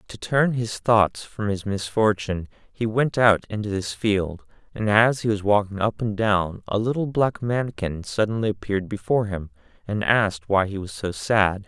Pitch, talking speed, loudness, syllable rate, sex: 105 Hz, 185 wpm, -23 LUFS, 4.8 syllables/s, male